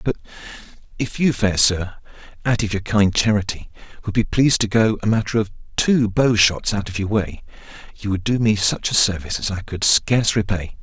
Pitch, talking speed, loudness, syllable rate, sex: 105 Hz, 205 wpm, -19 LUFS, 5.4 syllables/s, male